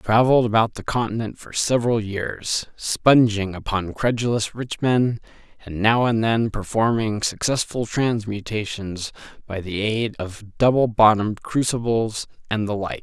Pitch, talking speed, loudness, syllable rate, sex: 110 Hz, 140 wpm, -21 LUFS, 4.5 syllables/s, male